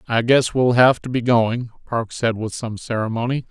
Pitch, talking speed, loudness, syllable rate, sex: 120 Hz, 205 wpm, -19 LUFS, 4.8 syllables/s, male